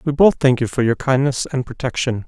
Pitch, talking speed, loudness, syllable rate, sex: 130 Hz, 235 wpm, -18 LUFS, 5.7 syllables/s, male